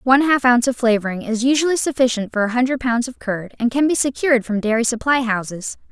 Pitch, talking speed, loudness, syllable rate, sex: 245 Hz, 225 wpm, -18 LUFS, 6.4 syllables/s, female